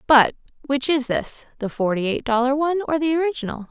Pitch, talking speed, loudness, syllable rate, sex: 265 Hz, 180 wpm, -21 LUFS, 6.1 syllables/s, female